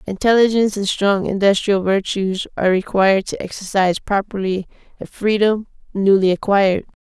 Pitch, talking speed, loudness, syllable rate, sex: 195 Hz, 120 wpm, -17 LUFS, 5.5 syllables/s, female